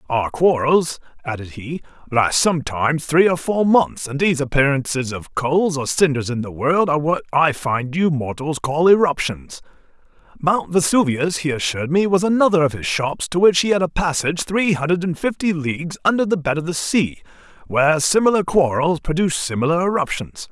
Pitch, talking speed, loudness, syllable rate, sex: 155 Hz, 180 wpm, -19 LUFS, 5.3 syllables/s, male